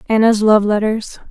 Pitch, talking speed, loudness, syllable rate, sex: 215 Hz, 140 wpm, -14 LUFS, 4.8 syllables/s, female